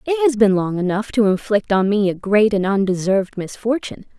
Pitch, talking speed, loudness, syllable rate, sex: 210 Hz, 200 wpm, -18 LUFS, 5.8 syllables/s, female